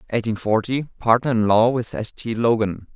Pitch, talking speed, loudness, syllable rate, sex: 115 Hz, 165 wpm, -20 LUFS, 7.6 syllables/s, male